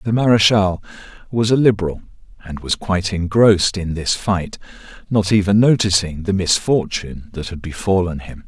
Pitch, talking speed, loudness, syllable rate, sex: 95 Hz, 150 wpm, -17 LUFS, 5.2 syllables/s, male